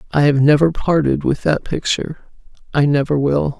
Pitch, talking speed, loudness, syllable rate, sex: 145 Hz, 150 wpm, -16 LUFS, 5.2 syllables/s, female